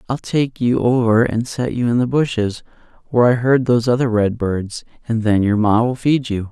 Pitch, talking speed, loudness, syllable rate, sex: 120 Hz, 210 wpm, -17 LUFS, 5.1 syllables/s, male